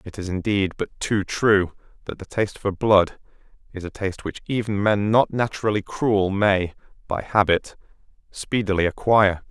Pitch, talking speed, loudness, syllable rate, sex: 100 Hz, 160 wpm, -22 LUFS, 4.9 syllables/s, male